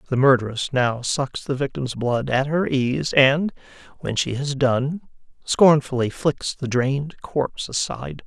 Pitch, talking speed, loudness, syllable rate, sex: 135 Hz, 155 wpm, -21 LUFS, 4.3 syllables/s, male